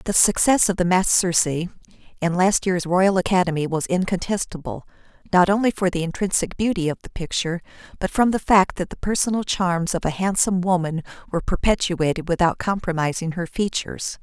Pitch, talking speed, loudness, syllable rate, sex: 180 Hz, 170 wpm, -21 LUFS, 5.7 syllables/s, female